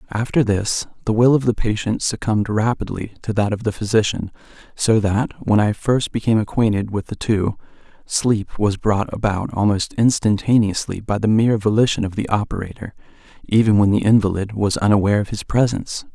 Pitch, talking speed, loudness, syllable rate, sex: 105 Hz, 170 wpm, -19 LUFS, 5.5 syllables/s, male